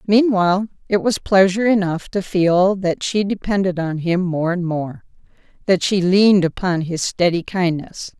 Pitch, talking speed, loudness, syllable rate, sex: 185 Hz, 160 wpm, -18 LUFS, 4.6 syllables/s, female